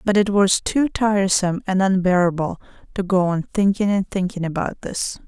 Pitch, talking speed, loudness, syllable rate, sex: 190 Hz, 170 wpm, -20 LUFS, 5.0 syllables/s, female